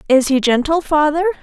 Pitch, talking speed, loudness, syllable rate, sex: 300 Hz, 170 wpm, -15 LUFS, 5.7 syllables/s, female